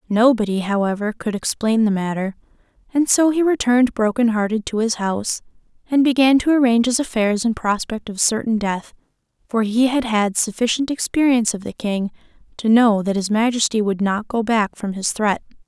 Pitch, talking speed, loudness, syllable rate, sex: 225 Hz, 180 wpm, -19 LUFS, 5.4 syllables/s, female